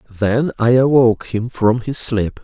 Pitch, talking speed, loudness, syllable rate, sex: 115 Hz, 170 wpm, -16 LUFS, 4.2 syllables/s, male